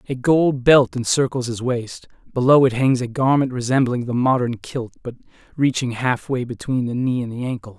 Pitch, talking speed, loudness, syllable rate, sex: 125 Hz, 185 wpm, -19 LUFS, 5.1 syllables/s, male